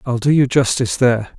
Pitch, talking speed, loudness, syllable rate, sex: 125 Hz, 215 wpm, -16 LUFS, 6.5 syllables/s, male